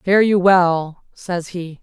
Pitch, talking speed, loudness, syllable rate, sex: 180 Hz, 165 wpm, -16 LUFS, 2.9 syllables/s, female